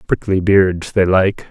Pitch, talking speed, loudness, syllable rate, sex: 95 Hz, 160 wpm, -15 LUFS, 3.8 syllables/s, male